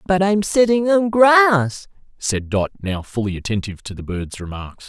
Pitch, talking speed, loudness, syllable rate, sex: 145 Hz, 170 wpm, -18 LUFS, 4.6 syllables/s, male